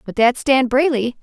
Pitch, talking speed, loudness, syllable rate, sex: 255 Hz, 195 wpm, -16 LUFS, 4.7 syllables/s, female